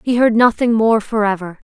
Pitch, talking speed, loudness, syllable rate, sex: 220 Hz, 175 wpm, -15 LUFS, 5.2 syllables/s, female